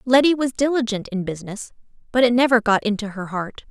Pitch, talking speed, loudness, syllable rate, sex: 230 Hz, 195 wpm, -20 LUFS, 6.0 syllables/s, female